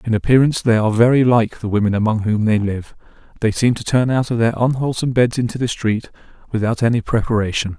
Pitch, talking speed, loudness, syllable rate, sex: 115 Hz, 210 wpm, -17 LUFS, 6.5 syllables/s, male